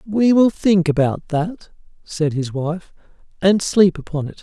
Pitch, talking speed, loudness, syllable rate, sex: 175 Hz, 165 wpm, -18 LUFS, 4.0 syllables/s, male